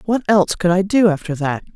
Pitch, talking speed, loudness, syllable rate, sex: 185 Hz, 240 wpm, -17 LUFS, 6.1 syllables/s, female